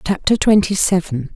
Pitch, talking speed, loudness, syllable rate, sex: 185 Hz, 135 wpm, -16 LUFS, 5.0 syllables/s, female